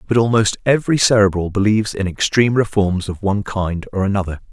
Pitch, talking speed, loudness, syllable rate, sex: 105 Hz, 175 wpm, -17 LUFS, 6.3 syllables/s, male